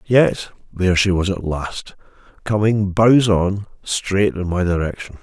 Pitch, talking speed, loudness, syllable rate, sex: 95 Hz, 140 wpm, -18 LUFS, 4.1 syllables/s, male